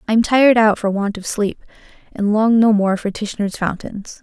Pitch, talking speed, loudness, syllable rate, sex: 210 Hz, 215 wpm, -17 LUFS, 5.1 syllables/s, female